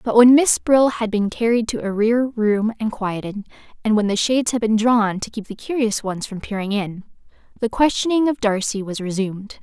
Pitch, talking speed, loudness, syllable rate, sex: 220 Hz, 210 wpm, -19 LUFS, 5.2 syllables/s, female